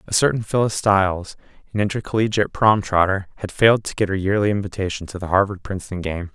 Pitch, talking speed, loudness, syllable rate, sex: 100 Hz, 190 wpm, -20 LUFS, 6.5 syllables/s, male